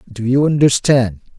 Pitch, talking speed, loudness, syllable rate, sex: 135 Hz, 130 wpm, -15 LUFS, 4.6 syllables/s, male